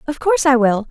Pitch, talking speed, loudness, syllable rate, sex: 250 Hz, 265 wpm, -15 LUFS, 6.6 syllables/s, female